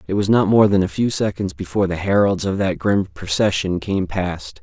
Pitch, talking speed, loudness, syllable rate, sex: 95 Hz, 220 wpm, -19 LUFS, 5.2 syllables/s, male